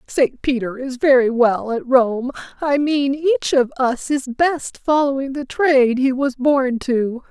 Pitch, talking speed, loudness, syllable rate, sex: 265 Hz, 170 wpm, -18 LUFS, 3.9 syllables/s, female